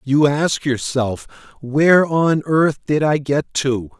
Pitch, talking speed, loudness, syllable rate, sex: 145 Hz, 150 wpm, -17 LUFS, 3.5 syllables/s, male